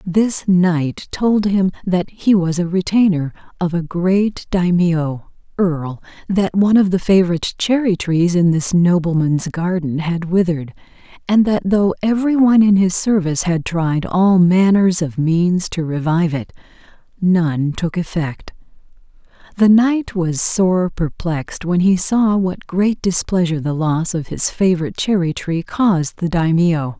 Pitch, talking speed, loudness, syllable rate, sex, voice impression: 180 Hz, 150 wpm, -16 LUFS, 4.4 syllables/s, female, feminine, middle-aged, tensed, slightly dark, soft, intellectual, slightly friendly, elegant, lively, strict, slightly modest